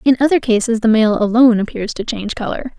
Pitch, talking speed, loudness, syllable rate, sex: 230 Hz, 215 wpm, -15 LUFS, 6.5 syllables/s, female